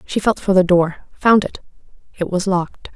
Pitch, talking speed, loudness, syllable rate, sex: 185 Hz, 185 wpm, -17 LUFS, 4.9 syllables/s, female